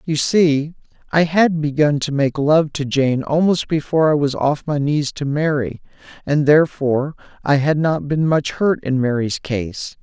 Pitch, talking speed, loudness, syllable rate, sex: 145 Hz, 180 wpm, -18 LUFS, 4.4 syllables/s, male